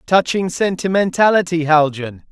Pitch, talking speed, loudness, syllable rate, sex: 170 Hz, 80 wpm, -16 LUFS, 4.6 syllables/s, male